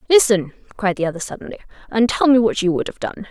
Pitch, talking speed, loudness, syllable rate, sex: 215 Hz, 235 wpm, -18 LUFS, 6.7 syllables/s, female